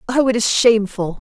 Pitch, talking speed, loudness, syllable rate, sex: 225 Hz, 190 wpm, -16 LUFS, 5.8 syllables/s, female